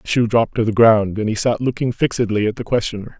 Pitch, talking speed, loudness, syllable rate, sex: 115 Hz, 265 wpm, -18 LUFS, 6.4 syllables/s, male